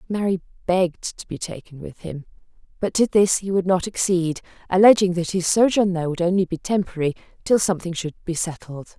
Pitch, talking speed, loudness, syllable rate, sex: 180 Hz, 185 wpm, -21 LUFS, 6.1 syllables/s, female